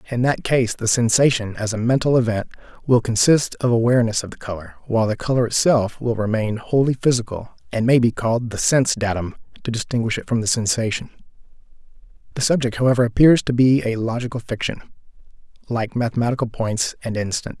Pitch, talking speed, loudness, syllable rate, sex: 120 Hz, 175 wpm, -20 LUFS, 6.1 syllables/s, male